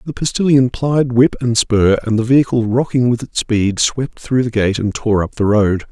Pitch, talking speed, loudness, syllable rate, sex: 120 Hz, 225 wpm, -15 LUFS, 4.8 syllables/s, male